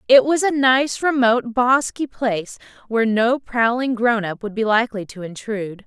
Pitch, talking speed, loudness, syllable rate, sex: 235 Hz, 175 wpm, -19 LUFS, 5.0 syllables/s, female